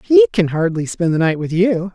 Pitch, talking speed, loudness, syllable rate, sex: 170 Hz, 245 wpm, -16 LUFS, 5.1 syllables/s, male